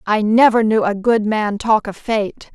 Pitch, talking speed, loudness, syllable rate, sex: 215 Hz, 210 wpm, -16 LUFS, 4.2 syllables/s, female